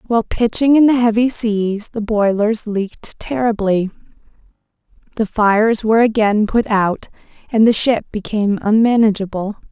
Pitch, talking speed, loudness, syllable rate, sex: 215 Hz, 130 wpm, -16 LUFS, 4.8 syllables/s, female